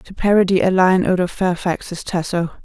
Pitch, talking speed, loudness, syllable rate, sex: 180 Hz, 180 wpm, -17 LUFS, 4.8 syllables/s, female